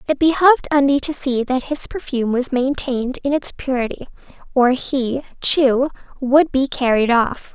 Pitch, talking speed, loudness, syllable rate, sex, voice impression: 265 Hz, 160 wpm, -18 LUFS, 4.7 syllables/s, female, very feminine, young, very thin, tensed, slightly weak, very bright, soft, clear, fluent, slightly raspy, very cute, intellectual, very refreshing, sincere, calm, very friendly, very reassuring, very unique, very elegant, very sweet, very lively, very kind, slightly intense, sharp, very light